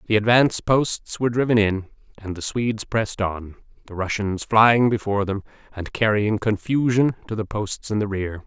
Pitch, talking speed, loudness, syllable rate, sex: 105 Hz, 175 wpm, -21 LUFS, 5.2 syllables/s, male